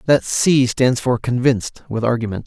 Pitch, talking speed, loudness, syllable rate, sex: 125 Hz, 170 wpm, -18 LUFS, 4.9 syllables/s, male